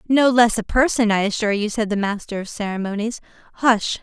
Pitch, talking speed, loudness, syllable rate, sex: 220 Hz, 210 wpm, -20 LUFS, 6.2 syllables/s, female